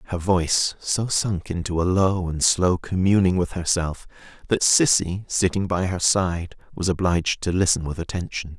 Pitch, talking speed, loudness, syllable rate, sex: 90 Hz, 170 wpm, -22 LUFS, 4.7 syllables/s, male